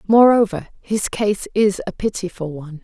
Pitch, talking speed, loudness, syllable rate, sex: 200 Hz, 150 wpm, -19 LUFS, 4.9 syllables/s, female